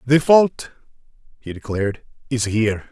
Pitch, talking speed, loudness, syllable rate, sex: 120 Hz, 125 wpm, -18 LUFS, 4.8 syllables/s, male